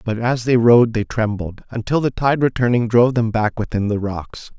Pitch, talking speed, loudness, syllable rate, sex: 115 Hz, 210 wpm, -18 LUFS, 5.3 syllables/s, male